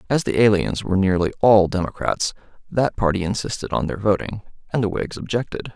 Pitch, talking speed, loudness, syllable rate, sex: 100 Hz, 175 wpm, -21 LUFS, 6.0 syllables/s, male